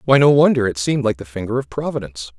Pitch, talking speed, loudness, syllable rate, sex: 120 Hz, 250 wpm, -18 LUFS, 7.2 syllables/s, male